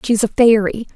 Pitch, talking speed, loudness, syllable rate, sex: 220 Hz, 190 wpm, -15 LUFS, 5.0 syllables/s, female